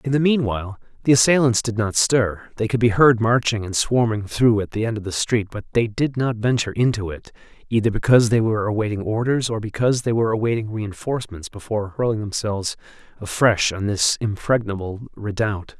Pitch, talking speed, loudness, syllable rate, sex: 110 Hz, 185 wpm, -20 LUFS, 5.8 syllables/s, male